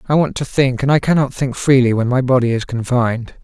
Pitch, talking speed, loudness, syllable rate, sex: 130 Hz, 245 wpm, -16 LUFS, 5.9 syllables/s, male